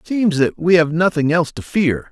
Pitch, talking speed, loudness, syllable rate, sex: 160 Hz, 255 wpm, -17 LUFS, 5.3 syllables/s, male